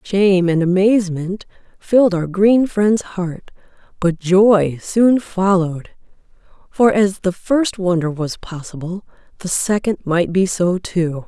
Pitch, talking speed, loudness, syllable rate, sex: 185 Hz, 135 wpm, -17 LUFS, 3.9 syllables/s, female